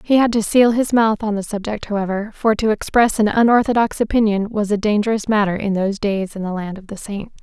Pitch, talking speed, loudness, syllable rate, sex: 210 Hz, 235 wpm, -18 LUFS, 5.9 syllables/s, female